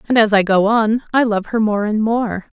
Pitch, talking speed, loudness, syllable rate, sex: 215 Hz, 255 wpm, -16 LUFS, 4.8 syllables/s, female